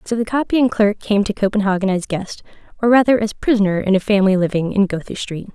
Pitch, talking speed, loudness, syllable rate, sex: 205 Hz, 215 wpm, -17 LUFS, 6.2 syllables/s, female